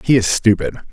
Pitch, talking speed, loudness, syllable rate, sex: 100 Hz, 195 wpm, -16 LUFS, 5.7 syllables/s, male